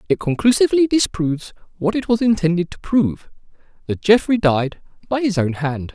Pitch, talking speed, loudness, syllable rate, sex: 190 Hz, 160 wpm, -18 LUFS, 5.6 syllables/s, male